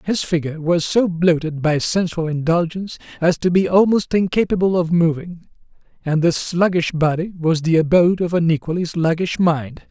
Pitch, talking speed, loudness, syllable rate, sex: 170 Hz, 165 wpm, -18 LUFS, 5.1 syllables/s, male